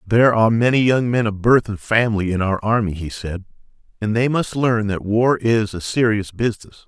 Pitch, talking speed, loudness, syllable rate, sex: 110 Hz, 210 wpm, -18 LUFS, 5.4 syllables/s, male